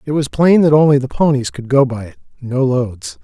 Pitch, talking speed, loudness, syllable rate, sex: 135 Hz, 225 wpm, -14 LUFS, 5.2 syllables/s, male